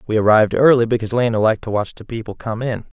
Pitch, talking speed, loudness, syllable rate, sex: 115 Hz, 240 wpm, -17 LUFS, 7.3 syllables/s, male